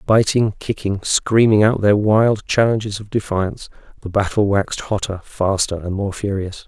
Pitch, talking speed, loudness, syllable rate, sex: 100 Hz, 155 wpm, -18 LUFS, 4.7 syllables/s, male